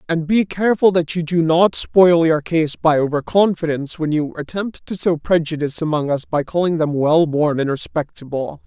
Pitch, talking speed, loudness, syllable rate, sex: 160 Hz, 195 wpm, -18 LUFS, 5.1 syllables/s, male